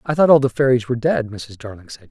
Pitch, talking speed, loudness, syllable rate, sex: 125 Hz, 285 wpm, -17 LUFS, 6.6 syllables/s, male